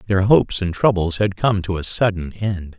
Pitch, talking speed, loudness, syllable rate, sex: 95 Hz, 215 wpm, -19 LUFS, 5.0 syllables/s, male